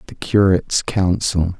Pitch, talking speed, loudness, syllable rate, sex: 95 Hz, 115 wpm, -17 LUFS, 4.3 syllables/s, male